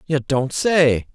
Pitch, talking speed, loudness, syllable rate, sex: 140 Hz, 160 wpm, -18 LUFS, 3.1 syllables/s, male